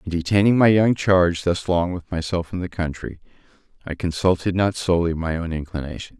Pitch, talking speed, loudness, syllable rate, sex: 90 Hz, 185 wpm, -21 LUFS, 5.7 syllables/s, male